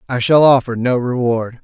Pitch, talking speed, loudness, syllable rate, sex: 125 Hz, 185 wpm, -14 LUFS, 4.9 syllables/s, male